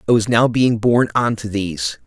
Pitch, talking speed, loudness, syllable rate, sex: 115 Hz, 230 wpm, -17 LUFS, 5.5 syllables/s, male